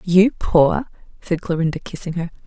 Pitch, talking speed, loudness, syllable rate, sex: 175 Hz, 145 wpm, -20 LUFS, 4.6 syllables/s, female